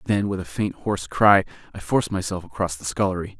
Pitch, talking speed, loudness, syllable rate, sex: 95 Hz, 210 wpm, -23 LUFS, 6.1 syllables/s, male